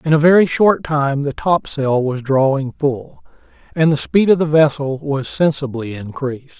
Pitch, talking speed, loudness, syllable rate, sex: 140 Hz, 175 wpm, -16 LUFS, 4.5 syllables/s, male